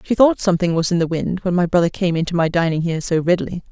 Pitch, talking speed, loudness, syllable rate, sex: 175 Hz, 275 wpm, -18 LUFS, 7.0 syllables/s, female